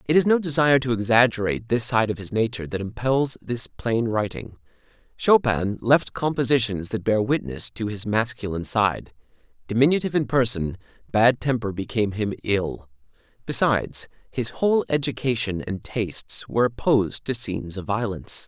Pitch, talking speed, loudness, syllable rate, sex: 115 Hz, 150 wpm, -23 LUFS, 5.3 syllables/s, male